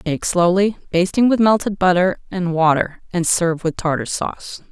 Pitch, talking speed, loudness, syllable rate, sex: 180 Hz, 165 wpm, -18 LUFS, 5.0 syllables/s, female